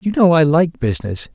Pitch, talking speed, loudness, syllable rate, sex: 155 Hz, 220 wpm, -16 LUFS, 5.4 syllables/s, male